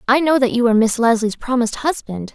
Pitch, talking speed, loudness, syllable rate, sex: 240 Hz, 230 wpm, -17 LUFS, 6.4 syllables/s, female